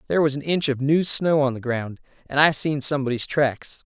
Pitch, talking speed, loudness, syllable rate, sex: 140 Hz, 230 wpm, -21 LUFS, 5.5 syllables/s, male